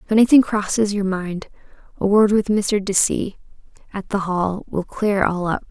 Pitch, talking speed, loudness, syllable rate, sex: 200 Hz, 190 wpm, -19 LUFS, 4.6 syllables/s, female